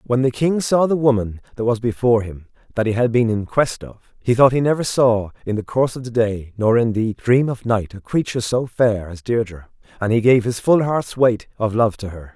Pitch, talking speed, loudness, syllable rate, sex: 115 Hz, 250 wpm, -19 LUFS, 5.3 syllables/s, male